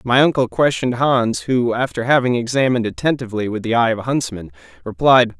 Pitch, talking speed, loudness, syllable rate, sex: 120 Hz, 180 wpm, -17 LUFS, 6.1 syllables/s, male